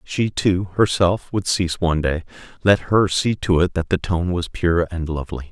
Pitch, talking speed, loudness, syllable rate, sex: 90 Hz, 205 wpm, -20 LUFS, 4.8 syllables/s, male